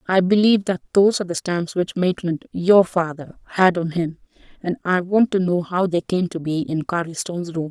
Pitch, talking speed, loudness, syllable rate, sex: 180 Hz, 195 wpm, -20 LUFS, 5.3 syllables/s, female